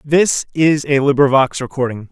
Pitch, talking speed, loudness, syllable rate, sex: 140 Hz, 140 wpm, -15 LUFS, 4.7 syllables/s, male